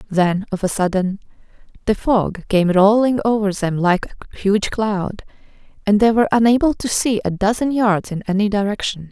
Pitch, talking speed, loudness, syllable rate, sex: 205 Hz, 170 wpm, -18 LUFS, 5.0 syllables/s, female